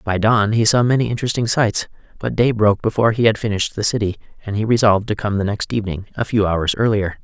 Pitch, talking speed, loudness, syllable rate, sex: 105 Hz, 230 wpm, -18 LUFS, 6.7 syllables/s, male